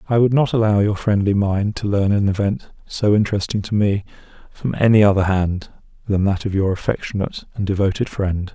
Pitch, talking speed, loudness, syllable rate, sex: 100 Hz, 190 wpm, -19 LUFS, 5.6 syllables/s, male